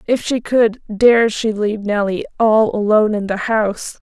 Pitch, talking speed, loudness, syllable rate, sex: 215 Hz, 175 wpm, -16 LUFS, 4.7 syllables/s, female